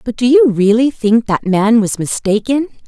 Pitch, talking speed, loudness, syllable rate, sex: 230 Hz, 190 wpm, -13 LUFS, 4.6 syllables/s, female